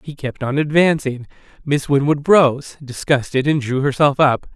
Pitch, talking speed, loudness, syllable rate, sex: 140 Hz, 160 wpm, -17 LUFS, 4.5 syllables/s, male